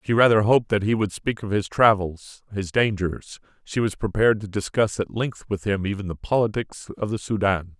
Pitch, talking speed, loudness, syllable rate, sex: 105 Hz, 210 wpm, -23 LUFS, 5.2 syllables/s, male